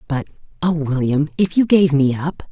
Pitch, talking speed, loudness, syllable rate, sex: 155 Hz, 190 wpm, -18 LUFS, 4.8 syllables/s, female